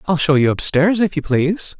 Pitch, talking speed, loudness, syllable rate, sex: 165 Hz, 270 wpm, -16 LUFS, 5.4 syllables/s, male